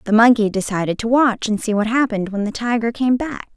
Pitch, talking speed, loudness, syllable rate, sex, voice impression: 225 Hz, 235 wpm, -18 LUFS, 5.9 syllables/s, female, feminine, adult-like, tensed, powerful, bright, slightly soft, slightly raspy, intellectual, friendly, elegant, lively